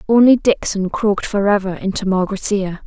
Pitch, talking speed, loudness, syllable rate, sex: 200 Hz, 170 wpm, -17 LUFS, 5.5 syllables/s, female